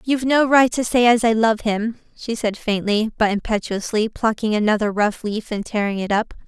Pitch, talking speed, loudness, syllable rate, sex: 220 Hz, 205 wpm, -19 LUFS, 5.2 syllables/s, female